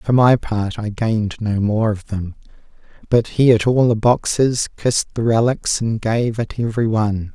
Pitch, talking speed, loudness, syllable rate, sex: 110 Hz, 180 wpm, -18 LUFS, 4.5 syllables/s, male